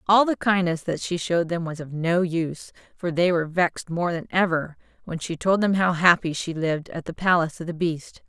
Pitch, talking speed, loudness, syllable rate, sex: 170 Hz, 230 wpm, -23 LUFS, 5.6 syllables/s, female